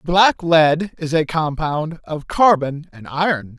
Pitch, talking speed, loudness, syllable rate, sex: 160 Hz, 135 wpm, -18 LUFS, 3.6 syllables/s, male